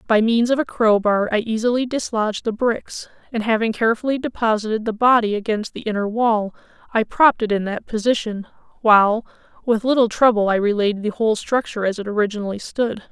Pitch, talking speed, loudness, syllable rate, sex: 220 Hz, 180 wpm, -19 LUFS, 5.9 syllables/s, female